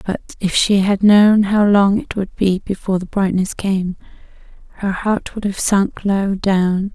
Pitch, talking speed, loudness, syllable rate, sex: 195 Hz, 180 wpm, -16 LUFS, 4.1 syllables/s, female